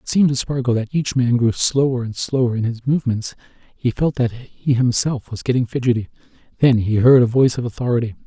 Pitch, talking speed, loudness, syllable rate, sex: 125 Hz, 210 wpm, -18 LUFS, 6.1 syllables/s, male